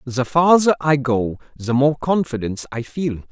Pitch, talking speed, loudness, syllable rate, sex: 140 Hz, 165 wpm, -19 LUFS, 4.7 syllables/s, male